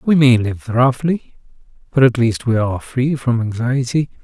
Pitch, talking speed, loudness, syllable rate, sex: 125 Hz, 170 wpm, -17 LUFS, 4.6 syllables/s, male